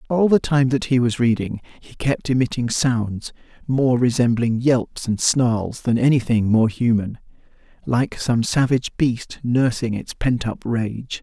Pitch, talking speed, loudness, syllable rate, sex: 120 Hz, 150 wpm, -20 LUFS, 4.2 syllables/s, male